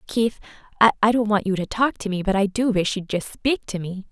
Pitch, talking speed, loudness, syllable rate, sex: 205 Hz, 265 wpm, -22 LUFS, 5.3 syllables/s, female